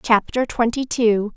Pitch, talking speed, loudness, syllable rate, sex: 230 Hz, 130 wpm, -19 LUFS, 4.0 syllables/s, female